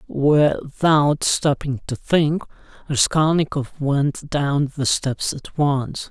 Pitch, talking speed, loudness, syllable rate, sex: 145 Hz, 110 wpm, -20 LUFS, 3.2 syllables/s, male